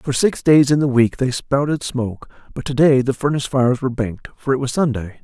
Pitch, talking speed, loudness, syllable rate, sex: 130 Hz, 240 wpm, -18 LUFS, 6.1 syllables/s, male